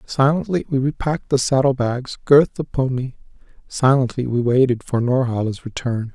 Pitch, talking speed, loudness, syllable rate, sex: 130 Hz, 135 wpm, -19 LUFS, 5.1 syllables/s, male